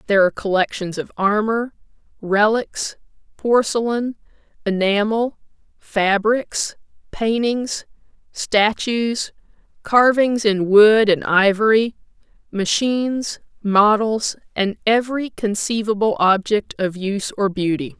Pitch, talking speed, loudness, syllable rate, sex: 215 Hz, 85 wpm, -19 LUFS, 3.9 syllables/s, female